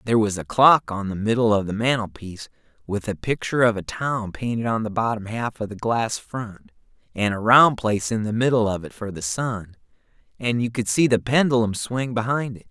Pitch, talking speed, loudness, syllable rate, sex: 110 Hz, 215 wpm, -22 LUFS, 5.5 syllables/s, male